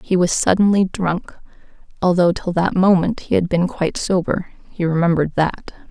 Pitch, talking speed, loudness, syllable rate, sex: 180 Hz, 160 wpm, -18 LUFS, 5.3 syllables/s, female